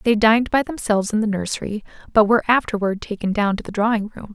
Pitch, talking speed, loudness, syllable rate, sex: 215 Hz, 220 wpm, -20 LUFS, 6.6 syllables/s, female